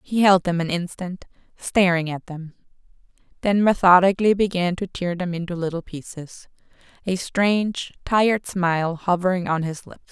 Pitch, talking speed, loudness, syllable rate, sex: 180 Hz, 150 wpm, -21 LUFS, 5.0 syllables/s, female